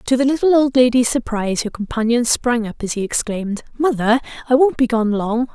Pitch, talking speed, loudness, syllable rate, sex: 240 Hz, 205 wpm, -18 LUFS, 5.7 syllables/s, female